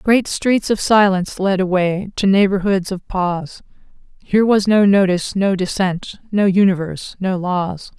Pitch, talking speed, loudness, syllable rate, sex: 190 Hz, 150 wpm, -17 LUFS, 4.6 syllables/s, female